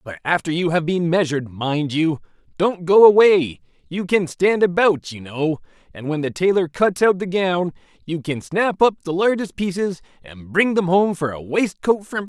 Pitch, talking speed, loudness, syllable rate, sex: 170 Hz, 200 wpm, -19 LUFS, 4.7 syllables/s, male